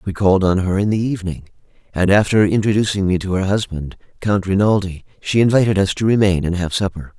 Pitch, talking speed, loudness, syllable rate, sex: 100 Hz, 200 wpm, -17 LUFS, 6.1 syllables/s, male